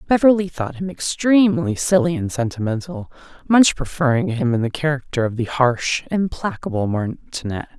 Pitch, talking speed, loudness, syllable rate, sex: 205 Hz, 140 wpm, -19 LUFS, 5.0 syllables/s, female